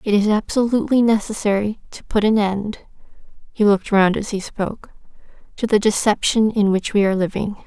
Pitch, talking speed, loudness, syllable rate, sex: 210 Hz, 155 wpm, -19 LUFS, 5.7 syllables/s, female